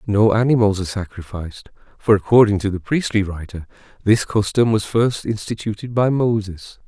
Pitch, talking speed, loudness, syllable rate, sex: 105 Hz, 150 wpm, -19 LUFS, 5.2 syllables/s, male